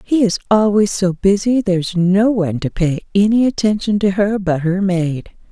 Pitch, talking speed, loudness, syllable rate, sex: 195 Hz, 185 wpm, -16 LUFS, 4.8 syllables/s, female